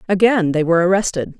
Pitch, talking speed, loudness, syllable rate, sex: 180 Hz, 170 wpm, -16 LUFS, 6.7 syllables/s, female